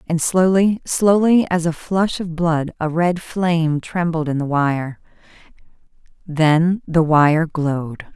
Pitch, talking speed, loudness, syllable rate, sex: 165 Hz, 140 wpm, -18 LUFS, 3.6 syllables/s, female